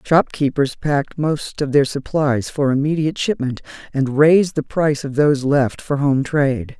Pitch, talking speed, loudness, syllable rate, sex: 140 Hz, 170 wpm, -18 LUFS, 4.9 syllables/s, female